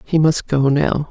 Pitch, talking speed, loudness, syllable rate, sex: 150 Hz, 215 wpm, -17 LUFS, 4.0 syllables/s, female